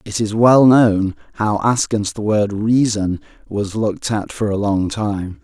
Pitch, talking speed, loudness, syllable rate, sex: 105 Hz, 175 wpm, -17 LUFS, 4.1 syllables/s, male